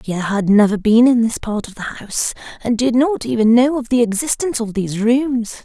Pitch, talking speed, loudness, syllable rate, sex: 230 Hz, 225 wpm, -16 LUFS, 5.6 syllables/s, female